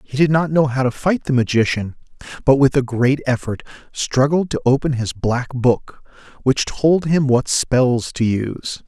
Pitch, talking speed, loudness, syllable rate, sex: 130 Hz, 185 wpm, -18 LUFS, 4.4 syllables/s, male